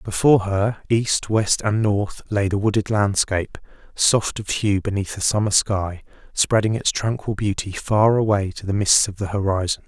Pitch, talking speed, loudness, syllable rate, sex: 105 Hz, 175 wpm, -20 LUFS, 4.7 syllables/s, male